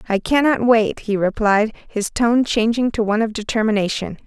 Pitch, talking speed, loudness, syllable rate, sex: 220 Hz, 170 wpm, -18 LUFS, 5.2 syllables/s, female